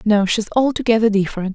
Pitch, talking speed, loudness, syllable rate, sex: 215 Hz, 155 wpm, -17 LUFS, 6.0 syllables/s, female